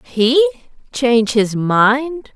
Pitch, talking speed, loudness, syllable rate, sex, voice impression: 245 Hz, 100 wpm, -15 LUFS, 3.0 syllables/s, female, very feminine, adult-like, slightly middle-aged, very thin, tensed, slightly powerful, bright, soft, very clear, fluent, slightly cute, intellectual, very refreshing, sincere, calm, very friendly, reassuring, unique, elegant, slightly wild, sweet, slightly lively, slightly kind, sharp